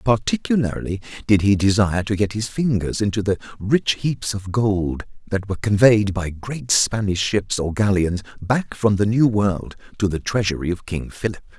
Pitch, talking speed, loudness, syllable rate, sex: 105 Hz, 175 wpm, -20 LUFS, 4.8 syllables/s, male